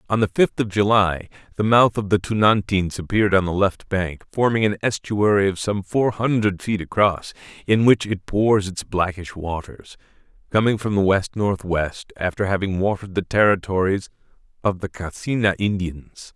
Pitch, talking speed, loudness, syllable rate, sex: 100 Hz, 165 wpm, -21 LUFS, 4.8 syllables/s, male